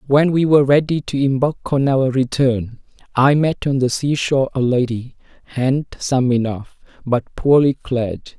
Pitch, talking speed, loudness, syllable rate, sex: 135 Hz, 155 wpm, -17 LUFS, 4.6 syllables/s, male